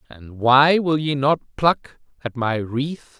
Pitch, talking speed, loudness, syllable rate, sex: 135 Hz, 170 wpm, -19 LUFS, 3.5 syllables/s, male